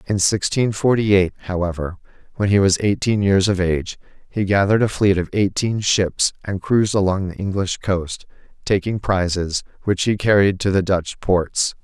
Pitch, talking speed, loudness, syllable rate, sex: 95 Hz, 170 wpm, -19 LUFS, 4.9 syllables/s, male